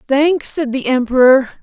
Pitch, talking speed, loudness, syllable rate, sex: 270 Hz, 150 wpm, -14 LUFS, 4.4 syllables/s, female